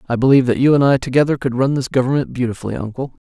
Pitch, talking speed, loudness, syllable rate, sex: 130 Hz, 240 wpm, -16 LUFS, 7.7 syllables/s, male